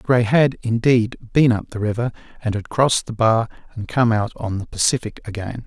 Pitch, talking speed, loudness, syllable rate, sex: 115 Hz, 200 wpm, -20 LUFS, 5.0 syllables/s, male